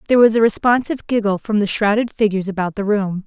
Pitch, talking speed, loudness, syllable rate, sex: 210 Hz, 220 wpm, -17 LUFS, 6.8 syllables/s, female